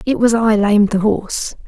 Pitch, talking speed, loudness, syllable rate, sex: 215 Hz, 215 wpm, -15 LUFS, 5.4 syllables/s, female